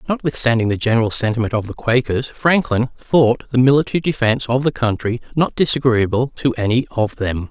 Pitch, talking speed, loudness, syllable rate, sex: 125 Hz, 170 wpm, -17 LUFS, 5.8 syllables/s, male